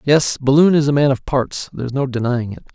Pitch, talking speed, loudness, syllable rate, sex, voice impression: 135 Hz, 265 wpm, -17 LUFS, 5.9 syllables/s, male, masculine, adult-like, slightly relaxed, slightly weak, bright, slightly halting, sincere, calm, friendly, reassuring, slightly wild, lively, slightly modest, light